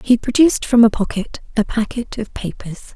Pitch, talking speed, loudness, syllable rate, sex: 225 Hz, 185 wpm, -17 LUFS, 5.7 syllables/s, female